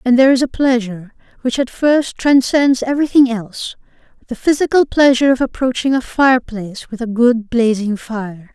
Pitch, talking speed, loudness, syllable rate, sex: 245 Hz, 155 wpm, -15 LUFS, 5.3 syllables/s, female